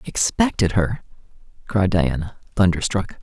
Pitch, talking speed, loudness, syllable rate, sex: 100 Hz, 95 wpm, -21 LUFS, 4.4 syllables/s, male